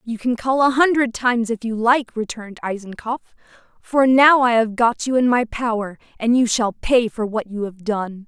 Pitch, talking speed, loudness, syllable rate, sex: 235 Hz, 210 wpm, -19 LUFS, 4.9 syllables/s, female